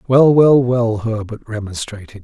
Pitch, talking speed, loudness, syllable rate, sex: 115 Hz, 135 wpm, -15 LUFS, 4.3 syllables/s, male